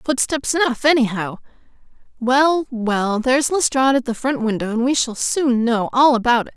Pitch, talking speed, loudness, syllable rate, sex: 250 Hz, 175 wpm, -18 LUFS, 5.0 syllables/s, female